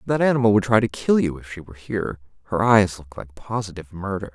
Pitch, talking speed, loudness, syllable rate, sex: 100 Hz, 235 wpm, -21 LUFS, 6.4 syllables/s, male